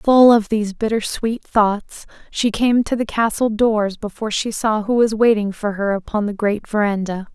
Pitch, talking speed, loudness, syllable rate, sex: 215 Hz, 195 wpm, -18 LUFS, 4.7 syllables/s, female